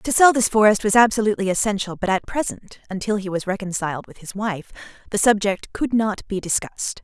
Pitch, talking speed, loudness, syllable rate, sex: 205 Hz, 195 wpm, -20 LUFS, 5.8 syllables/s, female